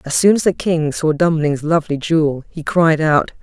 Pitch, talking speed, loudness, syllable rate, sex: 160 Hz, 210 wpm, -16 LUFS, 5.0 syllables/s, female